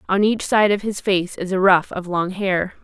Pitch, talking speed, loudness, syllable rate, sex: 190 Hz, 255 wpm, -19 LUFS, 4.6 syllables/s, female